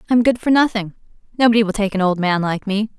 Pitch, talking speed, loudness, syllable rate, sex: 210 Hz, 260 wpm, -17 LUFS, 6.9 syllables/s, female